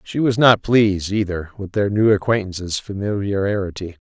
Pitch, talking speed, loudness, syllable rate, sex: 100 Hz, 145 wpm, -19 LUFS, 5.0 syllables/s, male